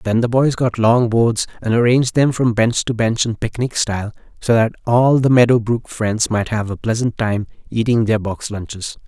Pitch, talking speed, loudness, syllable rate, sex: 115 Hz, 210 wpm, -17 LUFS, 4.9 syllables/s, male